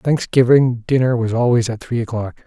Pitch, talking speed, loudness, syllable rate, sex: 120 Hz, 170 wpm, -17 LUFS, 4.9 syllables/s, male